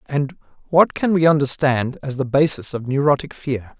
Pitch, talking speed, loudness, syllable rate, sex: 140 Hz, 175 wpm, -19 LUFS, 4.8 syllables/s, male